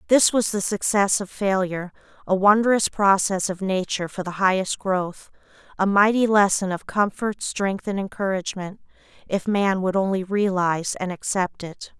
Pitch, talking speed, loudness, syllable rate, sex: 195 Hz, 150 wpm, -22 LUFS, 4.8 syllables/s, female